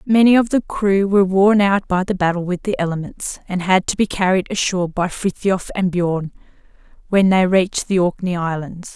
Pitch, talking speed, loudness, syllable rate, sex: 185 Hz, 200 wpm, -18 LUFS, 5.3 syllables/s, female